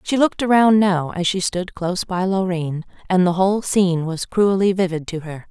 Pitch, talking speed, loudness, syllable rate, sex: 185 Hz, 205 wpm, -19 LUFS, 5.3 syllables/s, female